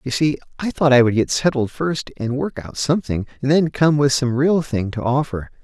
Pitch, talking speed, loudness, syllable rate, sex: 135 Hz, 235 wpm, -19 LUFS, 5.2 syllables/s, male